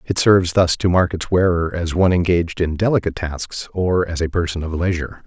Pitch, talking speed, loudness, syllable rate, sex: 85 Hz, 215 wpm, -18 LUFS, 5.9 syllables/s, male